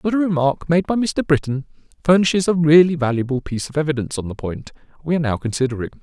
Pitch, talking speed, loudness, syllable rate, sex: 150 Hz, 210 wpm, -19 LUFS, 7.0 syllables/s, male